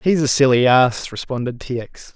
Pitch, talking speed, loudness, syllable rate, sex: 130 Hz, 195 wpm, -17 LUFS, 4.7 syllables/s, male